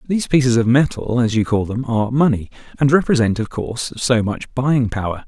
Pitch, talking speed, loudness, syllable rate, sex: 120 Hz, 205 wpm, -18 LUFS, 5.7 syllables/s, male